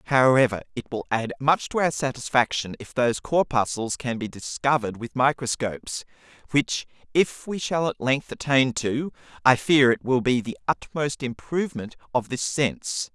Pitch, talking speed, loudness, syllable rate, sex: 130 Hz, 160 wpm, -24 LUFS, 4.8 syllables/s, male